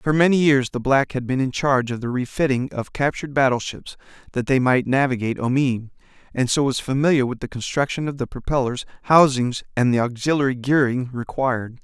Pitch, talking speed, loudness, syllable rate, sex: 130 Hz, 185 wpm, -21 LUFS, 5.8 syllables/s, male